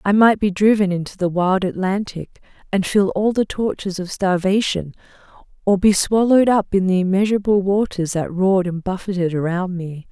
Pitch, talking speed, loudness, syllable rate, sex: 190 Hz, 170 wpm, -18 LUFS, 5.4 syllables/s, female